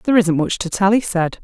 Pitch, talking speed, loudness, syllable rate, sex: 190 Hz, 290 wpm, -17 LUFS, 6.3 syllables/s, female